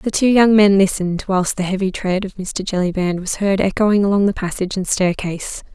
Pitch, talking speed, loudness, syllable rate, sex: 190 Hz, 210 wpm, -17 LUFS, 5.6 syllables/s, female